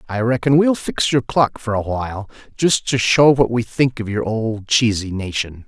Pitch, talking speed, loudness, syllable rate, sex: 115 Hz, 210 wpm, -18 LUFS, 4.6 syllables/s, male